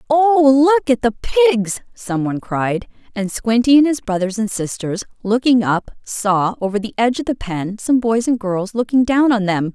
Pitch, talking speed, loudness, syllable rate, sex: 230 Hz, 190 wpm, -17 LUFS, 4.7 syllables/s, female